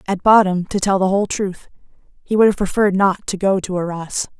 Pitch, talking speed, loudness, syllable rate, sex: 190 Hz, 220 wpm, -17 LUFS, 5.8 syllables/s, female